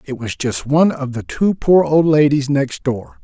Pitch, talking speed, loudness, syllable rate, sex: 135 Hz, 225 wpm, -16 LUFS, 4.5 syllables/s, male